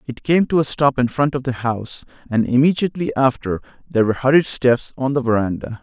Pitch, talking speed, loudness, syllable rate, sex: 130 Hz, 205 wpm, -19 LUFS, 6.1 syllables/s, male